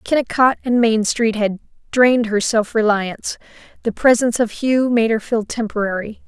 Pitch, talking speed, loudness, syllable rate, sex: 225 Hz, 165 wpm, -18 LUFS, 5.1 syllables/s, female